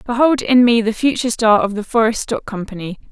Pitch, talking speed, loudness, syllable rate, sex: 225 Hz, 210 wpm, -16 LUFS, 5.8 syllables/s, female